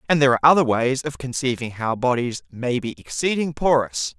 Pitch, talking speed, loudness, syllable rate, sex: 130 Hz, 185 wpm, -21 LUFS, 5.7 syllables/s, male